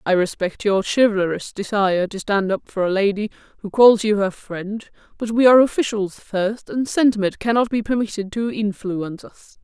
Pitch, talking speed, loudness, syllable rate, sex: 205 Hz, 180 wpm, -20 LUFS, 5.1 syllables/s, female